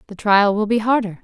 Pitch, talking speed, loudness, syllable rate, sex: 210 Hz, 245 wpm, -17 LUFS, 5.8 syllables/s, female